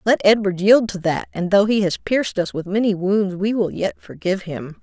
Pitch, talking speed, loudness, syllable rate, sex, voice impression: 200 Hz, 235 wpm, -19 LUFS, 5.2 syllables/s, female, very feminine, slightly young, slightly adult-like, very thin, tensed, slightly powerful, bright, hard, clear, slightly fluent, cute, intellectual, very refreshing, sincere, calm, friendly, reassuring, unique, elegant, sweet, slightly lively, slightly strict, slightly intense